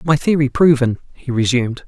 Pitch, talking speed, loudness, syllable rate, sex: 135 Hz, 160 wpm, -16 LUFS, 5.6 syllables/s, male